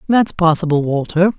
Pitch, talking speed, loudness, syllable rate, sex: 170 Hz, 130 wpm, -16 LUFS, 5.0 syllables/s, female